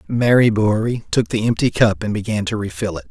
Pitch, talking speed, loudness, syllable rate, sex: 110 Hz, 210 wpm, -18 LUFS, 5.9 syllables/s, male